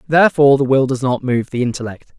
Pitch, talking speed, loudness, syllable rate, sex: 130 Hz, 220 wpm, -15 LUFS, 6.4 syllables/s, male